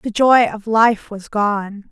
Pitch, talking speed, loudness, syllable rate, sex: 215 Hz, 190 wpm, -16 LUFS, 3.3 syllables/s, female